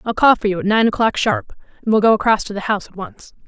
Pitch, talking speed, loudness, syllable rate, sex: 215 Hz, 295 wpm, -17 LUFS, 6.9 syllables/s, female